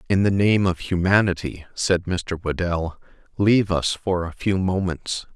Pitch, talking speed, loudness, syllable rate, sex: 90 Hz, 155 wpm, -22 LUFS, 4.3 syllables/s, male